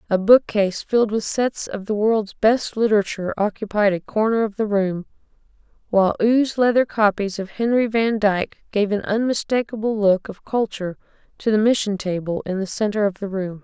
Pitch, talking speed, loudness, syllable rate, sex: 210 Hz, 175 wpm, -20 LUFS, 5.4 syllables/s, female